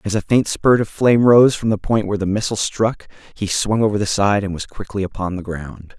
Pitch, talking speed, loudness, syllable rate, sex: 105 Hz, 250 wpm, -18 LUFS, 5.7 syllables/s, male